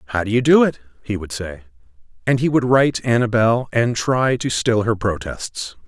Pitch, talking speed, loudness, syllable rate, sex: 115 Hz, 195 wpm, -19 LUFS, 4.7 syllables/s, male